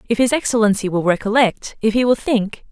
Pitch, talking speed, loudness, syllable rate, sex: 220 Hz, 175 wpm, -17 LUFS, 5.7 syllables/s, female